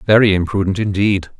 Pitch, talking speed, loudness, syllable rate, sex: 100 Hz, 130 wpm, -16 LUFS, 5.7 syllables/s, male